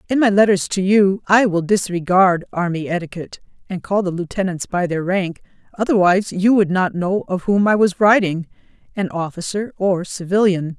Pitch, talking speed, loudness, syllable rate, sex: 185 Hz, 165 wpm, -18 LUFS, 5.1 syllables/s, female